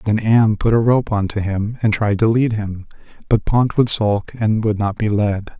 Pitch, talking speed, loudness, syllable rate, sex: 110 Hz, 235 wpm, -17 LUFS, 4.4 syllables/s, male